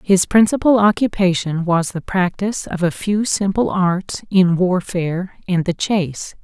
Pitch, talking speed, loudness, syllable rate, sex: 185 Hz, 150 wpm, -18 LUFS, 4.5 syllables/s, female